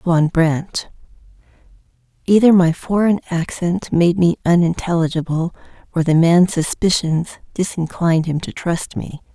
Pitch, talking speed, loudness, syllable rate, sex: 170 Hz, 115 wpm, -17 LUFS, 4.4 syllables/s, female